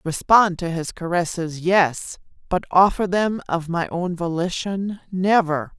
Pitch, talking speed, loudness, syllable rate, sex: 180 Hz, 135 wpm, -21 LUFS, 4.1 syllables/s, female